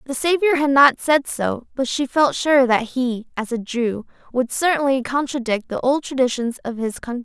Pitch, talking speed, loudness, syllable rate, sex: 260 Hz, 200 wpm, -20 LUFS, 5.0 syllables/s, female